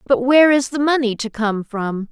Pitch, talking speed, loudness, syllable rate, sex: 245 Hz, 225 wpm, -17 LUFS, 5.1 syllables/s, female